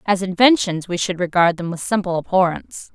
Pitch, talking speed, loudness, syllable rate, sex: 185 Hz, 185 wpm, -18 LUFS, 5.7 syllables/s, female